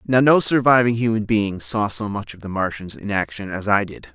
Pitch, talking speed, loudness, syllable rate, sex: 105 Hz, 230 wpm, -20 LUFS, 5.3 syllables/s, male